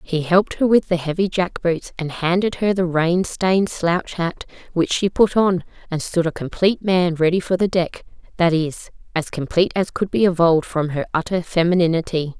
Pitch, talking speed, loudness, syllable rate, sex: 175 Hz, 195 wpm, -19 LUFS, 5.2 syllables/s, female